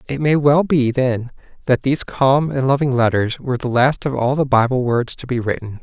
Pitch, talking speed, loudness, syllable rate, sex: 130 Hz, 225 wpm, -17 LUFS, 5.3 syllables/s, male